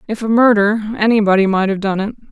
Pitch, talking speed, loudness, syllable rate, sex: 210 Hz, 210 wpm, -14 LUFS, 6.6 syllables/s, female